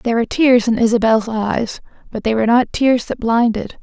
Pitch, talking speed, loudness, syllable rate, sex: 230 Hz, 205 wpm, -16 LUFS, 5.4 syllables/s, female